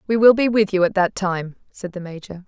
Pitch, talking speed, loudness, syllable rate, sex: 190 Hz, 265 wpm, -18 LUFS, 5.5 syllables/s, female